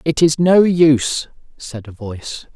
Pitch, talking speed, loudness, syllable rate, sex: 145 Hz, 165 wpm, -14 LUFS, 4.3 syllables/s, male